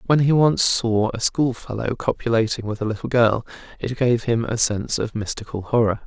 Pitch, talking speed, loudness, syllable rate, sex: 115 Hz, 190 wpm, -21 LUFS, 5.3 syllables/s, male